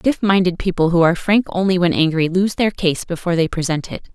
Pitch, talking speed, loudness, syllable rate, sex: 180 Hz, 230 wpm, -17 LUFS, 6.1 syllables/s, female